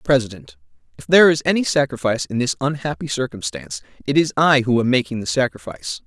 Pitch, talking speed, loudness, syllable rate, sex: 140 Hz, 180 wpm, -19 LUFS, 6.6 syllables/s, male